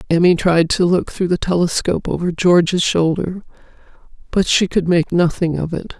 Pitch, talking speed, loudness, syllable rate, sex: 175 Hz, 170 wpm, -16 LUFS, 5.1 syllables/s, female